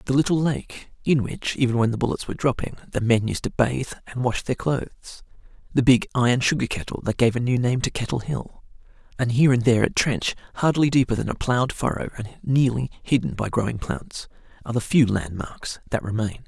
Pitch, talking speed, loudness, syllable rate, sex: 125 Hz, 210 wpm, -23 LUFS, 5.8 syllables/s, male